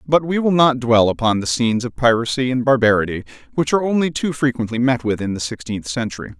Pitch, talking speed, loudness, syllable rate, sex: 125 Hz, 215 wpm, -18 LUFS, 6.3 syllables/s, male